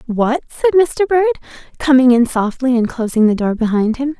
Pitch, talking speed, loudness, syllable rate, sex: 255 Hz, 185 wpm, -15 LUFS, 5.5 syllables/s, female